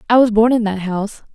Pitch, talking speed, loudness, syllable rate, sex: 215 Hz, 265 wpm, -16 LUFS, 6.5 syllables/s, female